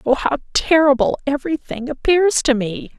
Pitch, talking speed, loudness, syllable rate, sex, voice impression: 285 Hz, 160 wpm, -17 LUFS, 5.1 syllables/s, female, slightly feminine, adult-like, intellectual, calm, slightly elegant, slightly sweet